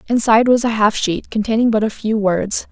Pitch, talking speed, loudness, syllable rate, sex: 220 Hz, 220 wpm, -16 LUFS, 5.6 syllables/s, female